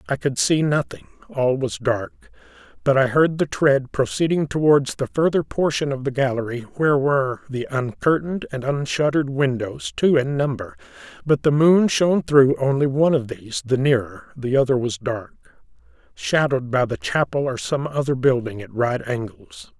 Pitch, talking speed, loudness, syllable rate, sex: 135 Hz, 170 wpm, -21 LUFS, 5.0 syllables/s, male